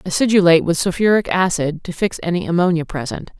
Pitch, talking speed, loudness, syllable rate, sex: 175 Hz, 160 wpm, -17 LUFS, 6.1 syllables/s, female